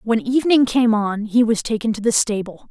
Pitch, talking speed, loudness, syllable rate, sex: 225 Hz, 220 wpm, -18 LUFS, 5.2 syllables/s, female